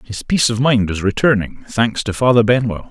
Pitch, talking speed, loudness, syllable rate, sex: 115 Hz, 205 wpm, -16 LUFS, 5.4 syllables/s, male